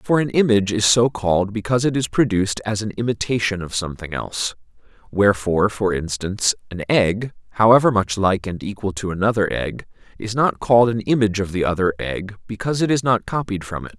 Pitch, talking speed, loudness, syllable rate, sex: 105 Hz, 195 wpm, -20 LUFS, 6.0 syllables/s, male